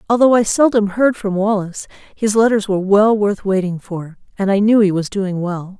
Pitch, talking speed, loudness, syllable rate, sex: 205 Hz, 205 wpm, -16 LUFS, 5.3 syllables/s, female